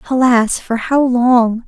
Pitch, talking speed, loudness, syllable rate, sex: 245 Hz, 145 wpm, -13 LUFS, 3.5 syllables/s, female